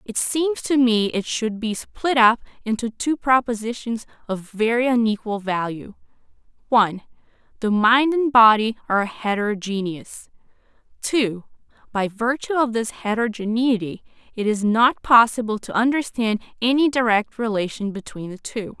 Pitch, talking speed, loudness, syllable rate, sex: 225 Hz, 130 wpm, -21 LUFS, 4.7 syllables/s, female